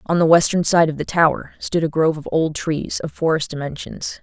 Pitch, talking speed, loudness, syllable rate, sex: 160 Hz, 225 wpm, -19 LUFS, 5.5 syllables/s, female